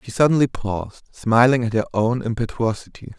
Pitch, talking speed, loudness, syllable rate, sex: 115 Hz, 150 wpm, -20 LUFS, 5.6 syllables/s, male